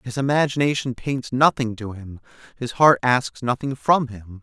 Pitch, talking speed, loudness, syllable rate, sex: 125 Hz, 165 wpm, -20 LUFS, 4.6 syllables/s, male